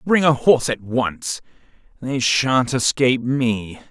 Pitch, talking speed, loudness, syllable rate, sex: 125 Hz, 140 wpm, -19 LUFS, 3.9 syllables/s, male